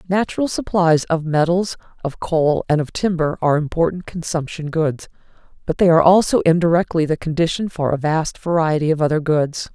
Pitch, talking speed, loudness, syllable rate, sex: 165 Hz, 165 wpm, -18 LUFS, 5.4 syllables/s, female